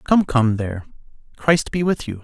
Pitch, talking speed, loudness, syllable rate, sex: 130 Hz, 190 wpm, -20 LUFS, 4.9 syllables/s, male